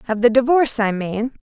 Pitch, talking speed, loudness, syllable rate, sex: 235 Hz, 210 wpm, -18 LUFS, 5.9 syllables/s, female